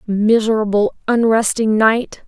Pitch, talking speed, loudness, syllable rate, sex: 220 Hz, 80 wpm, -15 LUFS, 3.9 syllables/s, female